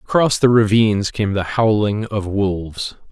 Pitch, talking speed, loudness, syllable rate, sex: 105 Hz, 155 wpm, -17 LUFS, 4.5 syllables/s, male